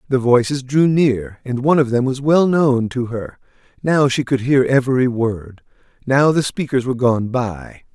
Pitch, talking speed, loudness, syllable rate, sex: 130 Hz, 190 wpm, -17 LUFS, 4.6 syllables/s, male